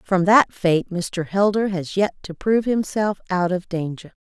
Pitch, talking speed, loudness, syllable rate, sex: 185 Hz, 185 wpm, -21 LUFS, 4.5 syllables/s, female